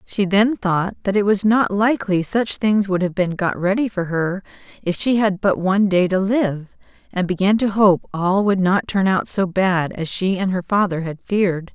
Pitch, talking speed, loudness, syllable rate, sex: 195 Hz, 220 wpm, -19 LUFS, 4.7 syllables/s, female